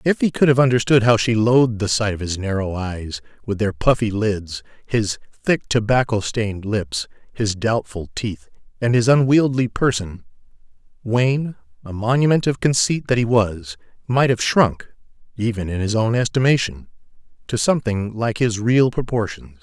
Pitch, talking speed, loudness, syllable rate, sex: 115 Hz, 160 wpm, -19 LUFS, 4.8 syllables/s, male